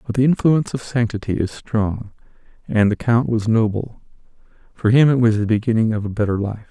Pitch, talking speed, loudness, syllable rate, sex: 110 Hz, 195 wpm, -19 LUFS, 5.7 syllables/s, male